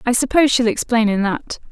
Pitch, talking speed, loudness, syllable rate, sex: 235 Hz, 210 wpm, -17 LUFS, 6.0 syllables/s, female